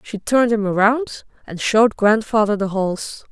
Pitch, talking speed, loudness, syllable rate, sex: 215 Hz, 165 wpm, -18 LUFS, 5.0 syllables/s, female